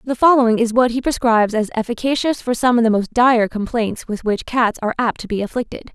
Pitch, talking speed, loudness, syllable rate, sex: 235 Hz, 230 wpm, -17 LUFS, 6.1 syllables/s, female